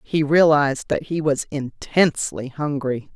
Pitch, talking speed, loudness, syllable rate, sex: 145 Hz, 135 wpm, -20 LUFS, 4.4 syllables/s, female